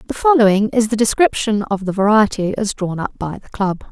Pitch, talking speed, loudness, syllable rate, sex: 215 Hz, 215 wpm, -17 LUFS, 5.2 syllables/s, female